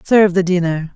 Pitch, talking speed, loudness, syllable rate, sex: 180 Hz, 190 wpm, -15 LUFS, 5.9 syllables/s, female